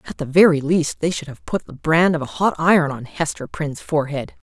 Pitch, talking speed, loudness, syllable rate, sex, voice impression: 155 Hz, 240 wpm, -19 LUFS, 5.8 syllables/s, female, feminine, middle-aged, slightly bright, muffled, raspy, slightly intellectual, slightly friendly, unique, slightly elegant, slightly strict, slightly sharp